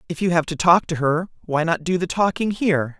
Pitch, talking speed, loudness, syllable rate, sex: 170 Hz, 260 wpm, -20 LUFS, 5.7 syllables/s, male